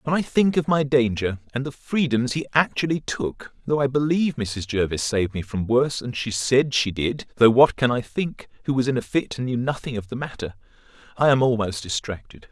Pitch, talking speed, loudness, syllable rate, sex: 125 Hz, 220 wpm, -22 LUFS, 4.7 syllables/s, male